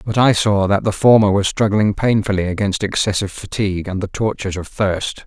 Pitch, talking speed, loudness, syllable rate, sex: 100 Hz, 195 wpm, -17 LUFS, 5.6 syllables/s, male